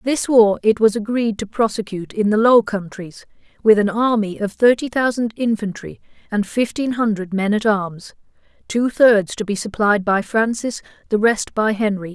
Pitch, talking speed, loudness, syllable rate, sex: 215 Hz, 175 wpm, -18 LUFS, 4.7 syllables/s, female